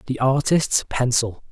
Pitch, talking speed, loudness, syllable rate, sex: 130 Hz, 120 wpm, -20 LUFS, 4.0 syllables/s, male